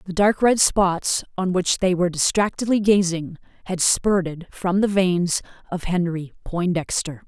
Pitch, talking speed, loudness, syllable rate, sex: 180 Hz, 150 wpm, -21 LUFS, 4.3 syllables/s, female